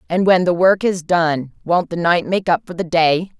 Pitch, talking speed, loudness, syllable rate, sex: 175 Hz, 230 wpm, -17 LUFS, 4.7 syllables/s, female